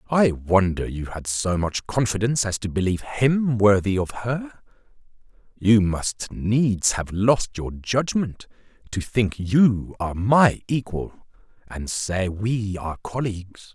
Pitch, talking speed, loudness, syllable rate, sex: 105 Hz, 140 wpm, -22 LUFS, 3.8 syllables/s, male